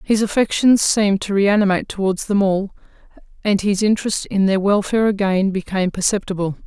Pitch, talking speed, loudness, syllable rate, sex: 200 Hz, 155 wpm, -18 LUFS, 5.9 syllables/s, female